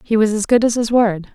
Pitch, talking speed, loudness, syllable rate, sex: 220 Hz, 315 wpm, -16 LUFS, 5.8 syllables/s, female